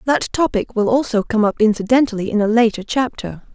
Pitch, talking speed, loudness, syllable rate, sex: 225 Hz, 185 wpm, -17 LUFS, 5.8 syllables/s, female